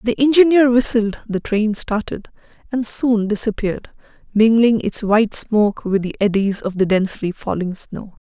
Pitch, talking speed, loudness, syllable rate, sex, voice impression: 215 Hz, 150 wpm, -17 LUFS, 4.9 syllables/s, female, feminine, middle-aged, tensed, powerful, bright, clear, halting, friendly, reassuring, elegant, lively, slightly kind